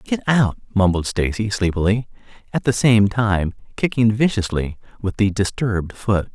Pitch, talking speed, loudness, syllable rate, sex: 105 Hz, 140 wpm, -20 LUFS, 4.6 syllables/s, male